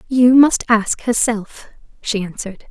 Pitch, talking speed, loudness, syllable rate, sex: 225 Hz, 135 wpm, -16 LUFS, 4.1 syllables/s, female